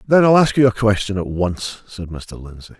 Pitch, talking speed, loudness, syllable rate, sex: 105 Hz, 235 wpm, -16 LUFS, 5.1 syllables/s, male